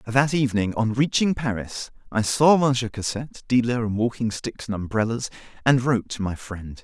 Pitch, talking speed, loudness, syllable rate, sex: 115 Hz, 175 wpm, -23 LUFS, 5.3 syllables/s, male